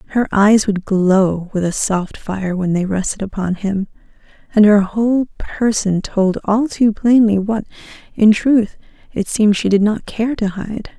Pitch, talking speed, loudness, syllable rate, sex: 205 Hz, 175 wpm, -16 LUFS, 4.3 syllables/s, female